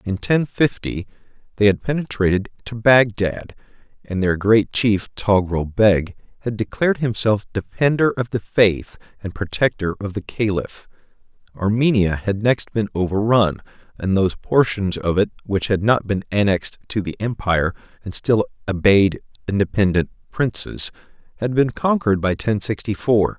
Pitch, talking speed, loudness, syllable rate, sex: 105 Hz, 145 wpm, -20 LUFS, 4.8 syllables/s, male